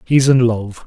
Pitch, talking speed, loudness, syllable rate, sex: 120 Hz, 210 wpm, -15 LUFS, 4.0 syllables/s, male